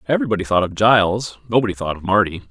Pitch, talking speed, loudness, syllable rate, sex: 105 Hz, 190 wpm, -18 LUFS, 7.2 syllables/s, male